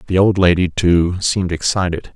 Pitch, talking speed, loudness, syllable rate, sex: 90 Hz, 165 wpm, -16 LUFS, 5.2 syllables/s, male